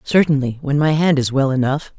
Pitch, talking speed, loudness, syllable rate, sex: 140 Hz, 210 wpm, -17 LUFS, 5.4 syllables/s, female